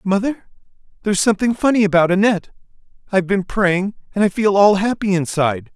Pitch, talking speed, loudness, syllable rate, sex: 195 Hz, 155 wpm, -17 LUFS, 6.2 syllables/s, male